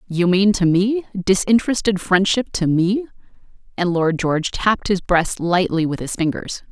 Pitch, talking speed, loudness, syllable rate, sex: 190 Hz, 150 wpm, -18 LUFS, 4.8 syllables/s, female